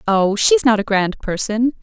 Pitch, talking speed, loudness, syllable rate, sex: 220 Hz, 200 wpm, -16 LUFS, 4.6 syllables/s, female